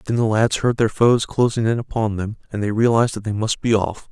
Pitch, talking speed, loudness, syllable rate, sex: 110 Hz, 265 wpm, -19 LUFS, 5.8 syllables/s, male